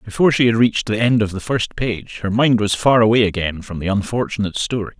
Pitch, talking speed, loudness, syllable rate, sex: 110 Hz, 240 wpm, -18 LUFS, 6.2 syllables/s, male